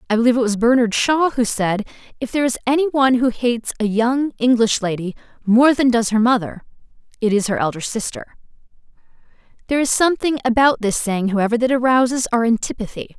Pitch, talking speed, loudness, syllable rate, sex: 240 Hz, 180 wpm, -18 LUFS, 6.1 syllables/s, female